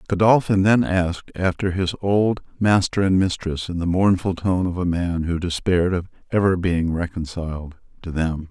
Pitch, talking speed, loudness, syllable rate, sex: 90 Hz, 170 wpm, -21 LUFS, 4.8 syllables/s, male